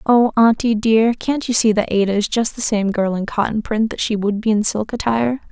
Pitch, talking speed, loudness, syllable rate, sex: 220 Hz, 250 wpm, -17 LUFS, 5.4 syllables/s, female